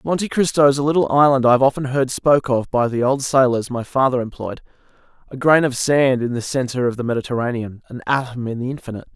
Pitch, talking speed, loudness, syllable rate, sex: 130 Hz, 215 wpm, -18 LUFS, 6.3 syllables/s, male